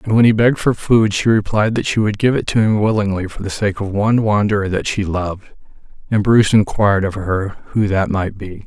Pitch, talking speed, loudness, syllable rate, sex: 105 Hz, 235 wpm, -16 LUFS, 5.6 syllables/s, male